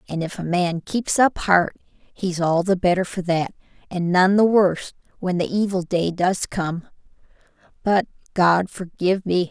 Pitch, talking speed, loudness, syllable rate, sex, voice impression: 180 Hz, 170 wpm, -21 LUFS, 4.4 syllables/s, female, very feminine, slightly young, slightly adult-like, thin, slightly tensed, slightly powerful, slightly dark, very hard, clear, slightly halting, slightly nasal, cute, intellectual, refreshing, sincere, very calm, very friendly, reassuring, very unique, elegant, slightly wild, very sweet, very kind, very modest, light